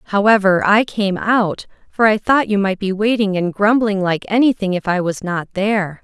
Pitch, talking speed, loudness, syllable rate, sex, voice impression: 205 Hz, 200 wpm, -16 LUFS, 4.8 syllables/s, female, very feminine, slightly middle-aged, slightly powerful, intellectual, slightly strict